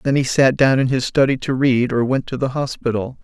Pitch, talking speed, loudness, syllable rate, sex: 130 Hz, 260 wpm, -18 LUFS, 5.4 syllables/s, male